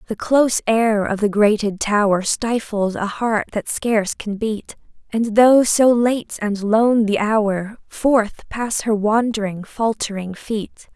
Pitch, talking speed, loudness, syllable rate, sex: 215 Hz, 155 wpm, -18 LUFS, 3.7 syllables/s, female